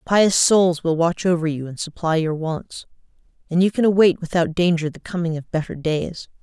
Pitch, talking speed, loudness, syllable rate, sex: 170 Hz, 195 wpm, -20 LUFS, 5.0 syllables/s, female